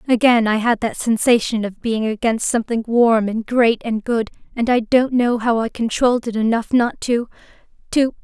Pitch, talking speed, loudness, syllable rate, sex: 230 Hz, 180 wpm, -18 LUFS, 4.9 syllables/s, female